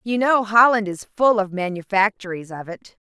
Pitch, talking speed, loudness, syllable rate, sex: 205 Hz, 175 wpm, -19 LUFS, 5.0 syllables/s, female